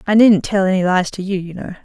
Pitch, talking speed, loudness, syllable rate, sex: 190 Hz, 295 wpm, -16 LUFS, 6.2 syllables/s, female